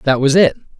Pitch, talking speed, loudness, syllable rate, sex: 140 Hz, 225 wpm, -13 LUFS, 6.5 syllables/s, male